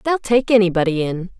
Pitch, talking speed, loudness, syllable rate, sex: 200 Hz, 170 wpm, -17 LUFS, 5.7 syllables/s, female